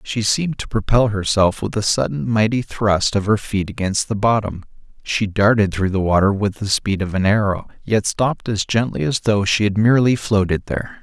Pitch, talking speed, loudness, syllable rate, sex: 105 Hz, 205 wpm, -18 LUFS, 5.2 syllables/s, male